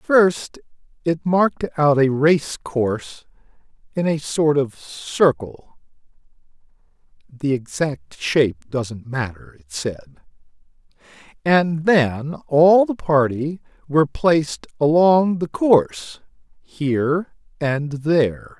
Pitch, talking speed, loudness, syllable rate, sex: 145 Hz, 105 wpm, -19 LUFS, 4.1 syllables/s, male